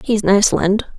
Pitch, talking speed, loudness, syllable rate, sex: 200 Hz, 185 wpm, -15 LUFS, 5.1 syllables/s, female